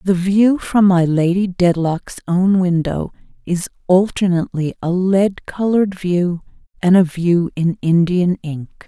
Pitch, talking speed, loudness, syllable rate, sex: 180 Hz, 135 wpm, -16 LUFS, 4.0 syllables/s, female